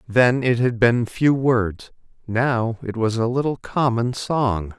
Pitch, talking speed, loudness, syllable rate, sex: 120 Hz, 165 wpm, -20 LUFS, 3.6 syllables/s, male